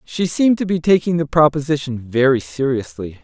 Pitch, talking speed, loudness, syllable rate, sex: 150 Hz, 165 wpm, -17 LUFS, 5.5 syllables/s, male